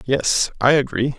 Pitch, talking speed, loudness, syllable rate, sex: 130 Hz, 150 wpm, -18 LUFS, 4.0 syllables/s, male